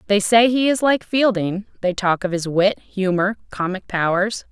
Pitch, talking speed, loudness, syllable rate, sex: 200 Hz, 185 wpm, -19 LUFS, 4.6 syllables/s, female